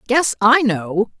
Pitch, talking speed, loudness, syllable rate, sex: 210 Hz, 150 wpm, -16 LUFS, 3.2 syllables/s, female